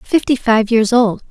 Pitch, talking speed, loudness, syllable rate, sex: 230 Hz, 185 wpm, -14 LUFS, 4.1 syllables/s, female